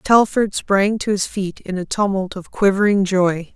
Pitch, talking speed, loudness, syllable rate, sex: 195 Hz, 185 wpm, -18 LUFS, 4.3 syllables/s, female